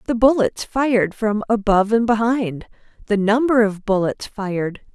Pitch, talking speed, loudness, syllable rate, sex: 215 Hz, 145 wpm, -19 LUFS, 4.7 syllables/s, female